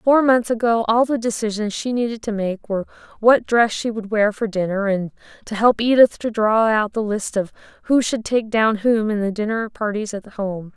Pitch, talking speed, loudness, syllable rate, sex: 220 Hz, 215 wpm, -19 LUFS, 5.0 syllables/s, female